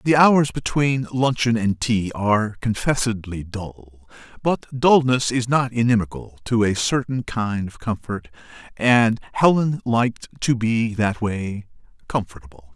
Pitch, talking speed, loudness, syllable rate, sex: 115 Hz, 130 wpm, -21 LUFS, 4.1 syllables/s, male